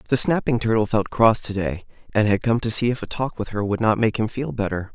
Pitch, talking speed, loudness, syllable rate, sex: 110 Hz, 280 wpm, -22 LUFS, 5.8 syllables/s, male